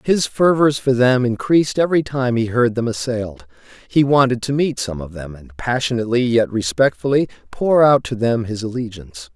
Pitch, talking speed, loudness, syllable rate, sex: 120 Hz, 180 wpm, -18 LUFS, 5.4 syllables/s, male